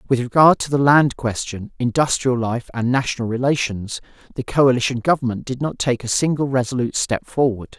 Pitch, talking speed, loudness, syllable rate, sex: 125 Hz, 170 wpm, -19 LUFS, 5.6 syllables/s, male